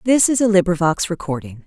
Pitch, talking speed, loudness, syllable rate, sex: 185 Hz, 180 wpm, -18 LUFS, 5.9 syllables/s, female